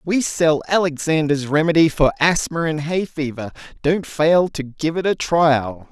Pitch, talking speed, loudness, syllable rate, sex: 155 Hz, 160 wpm, -19 LUFS, 4.3 syllables/s, male